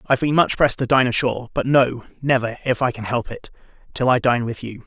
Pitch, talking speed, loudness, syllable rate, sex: 125 Hz, 260 wpm, -19 LUFS, 6.2 syllables/s, male